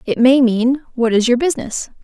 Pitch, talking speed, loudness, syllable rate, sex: 250 Hz, 205 wpm, -15 LUFS, 5.4 syllables/s, female